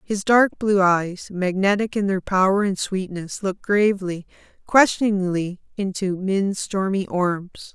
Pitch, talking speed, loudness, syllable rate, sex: 190 Hz, 130 wpm, -21 LUFS, 4.1 syllables/s, female